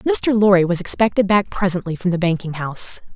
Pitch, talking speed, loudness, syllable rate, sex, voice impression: 190 Hz, 190 wpm, -17 LUFS, 5.7 syllables/s, female, feminine, adult-like, tensed, powerful, bright, fluent, intellectual, calm, slightly friendly, reassuring, elegant, kind